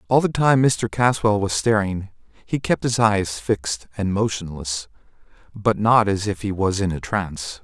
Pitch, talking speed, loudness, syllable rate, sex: 100 Hz, 175 wpm, -21 LUFS, 4.5 syllables/s, male